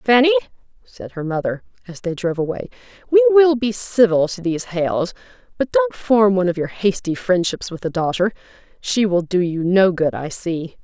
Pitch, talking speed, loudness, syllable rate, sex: 195 Hz, 190 wpm, -19 LUFS, 5.1 syllables/s, female